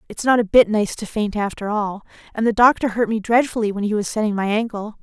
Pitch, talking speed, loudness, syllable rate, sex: 215 Hz, 250 wpm, -19 LUFS, 6.0 syllables/s, female